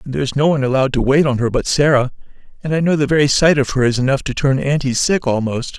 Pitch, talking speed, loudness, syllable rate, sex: 135 Hz, 280 wpm, -16 LUFS, 6.9 syllables/s, male